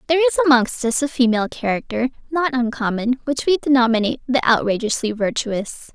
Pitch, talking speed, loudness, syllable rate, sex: 250 Hz, 150 wpm, -19 LUFS, 6.2 syllables/s, female